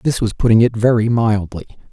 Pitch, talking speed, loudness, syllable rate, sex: 110 Hz, 190 wpm, -15 LUFS, 5.7 syllables/s, male